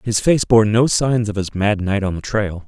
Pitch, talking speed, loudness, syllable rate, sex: 105 Hz, 270 wpm, -17 LUFS, 4.7 syllables/s, male